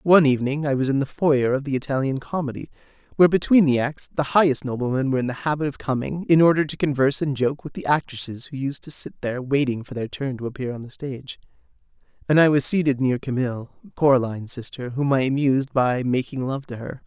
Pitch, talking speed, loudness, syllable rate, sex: 135 Hz, 220 wpm, -22 LUFS, 6.4 syllables/s, male